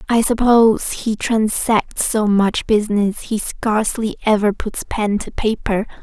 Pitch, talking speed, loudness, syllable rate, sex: 220 Hz, 140 wpm, -17 LUFS, 4.1 syllables/s, female